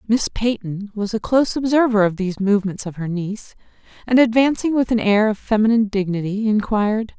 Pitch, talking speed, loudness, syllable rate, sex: 215 Hz, 175 wpm, -19 LUFS, 5.9 syllables/s, female